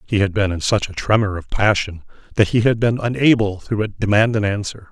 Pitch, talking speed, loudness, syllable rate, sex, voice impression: 105 Hz, 220 wpm, -18 LUFS, 5.5 syllables/s, male, very masculine, slightly old, thick, muffled, slightly calm, wild